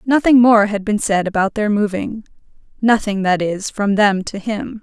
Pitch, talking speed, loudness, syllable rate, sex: 210 Hz, 175 wpm, -16 LUFS, 4.6 syllables/s, female